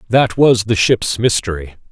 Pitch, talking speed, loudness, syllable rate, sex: 110 Hz, 155 wpm, -14 LUFS, 4.4 syllables/s, male